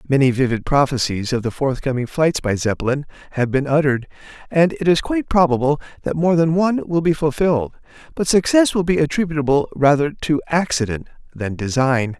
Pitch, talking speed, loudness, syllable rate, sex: 145 Hz, 165 wpm, -18 LUFS, 5.7 syllables/s, male